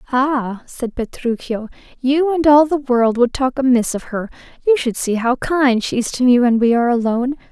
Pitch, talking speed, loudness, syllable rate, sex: 255 Hz, 210 wpm, -17 LUFS, 5.0 syllables/s, female